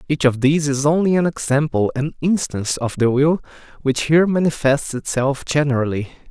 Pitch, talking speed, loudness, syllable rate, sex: 145 Hz, 160 wpm, -19 LUFS, 5.6 syllables/s, male